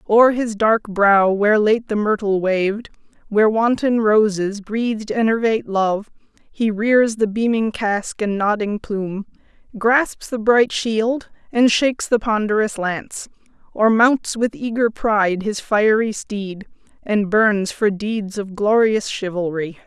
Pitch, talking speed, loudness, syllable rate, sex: 215 Hz, 140 wpm, -18 LUFS, 4.1 syllables/s, female